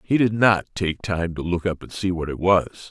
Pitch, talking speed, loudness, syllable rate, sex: 90 Hz, 270 wpm, -22 LUFS, 4.8 syllables/s, male